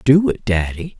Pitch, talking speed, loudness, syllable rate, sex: 125 Hz, 180 wpm, -18 LUFS, 4.5 syllables/s, male